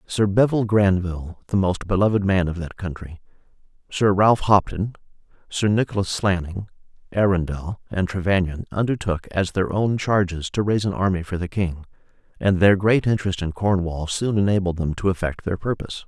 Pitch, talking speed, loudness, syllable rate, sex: 95 Hz, 165 wpm, -22 LUFS, 5.3 syllables/s, male